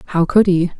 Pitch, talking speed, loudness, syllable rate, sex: 180 Hz, 230 wpm, -15 LUFS, 4.4 syllables/s, female